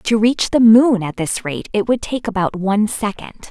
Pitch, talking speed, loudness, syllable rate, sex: 210 Hz, 220 wpm, -16 LUFS, 4.7 syllables/s, female